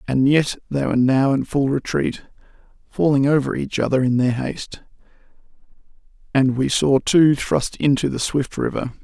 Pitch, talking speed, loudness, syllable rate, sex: 135 Hz, 160 wpm, -19 LUFS, 4.8 syllables/s, male